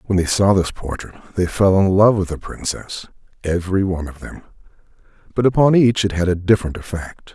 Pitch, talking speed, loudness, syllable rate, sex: 95 Hz, 190 wpm, -18 LUFS, 5.8 syllables/s, male